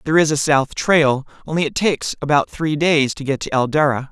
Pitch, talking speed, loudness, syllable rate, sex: 150 Hz, 220 wpm, -18 LUFS, 5.6 syllables/s, male